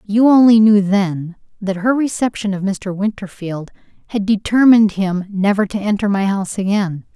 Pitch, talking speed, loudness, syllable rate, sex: 200 Hz, 160 wpm, -16 LUFS, 4.9 syllables/s, female